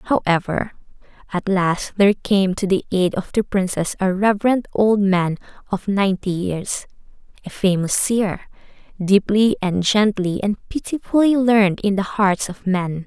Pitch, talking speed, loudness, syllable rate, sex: 195 Hz, 145 wpm, -19 LUFS, 4.4 syllables/s, female